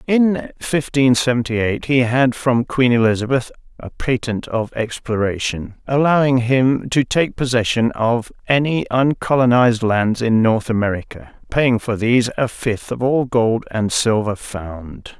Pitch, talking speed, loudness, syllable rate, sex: 120 Hz, 140 wpm, -18 LUFS, 4.2 syllables/s, male